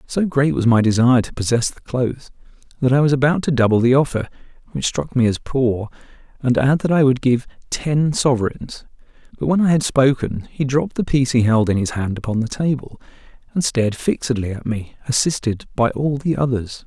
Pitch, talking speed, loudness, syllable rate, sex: 130 Hz, 205 wpm, -19 LUFS, 5.6 syllables/s, male